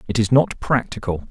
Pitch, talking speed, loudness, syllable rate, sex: 110 Hz, 185 wpm, -20 LUFS, 5.3 syllables/s, male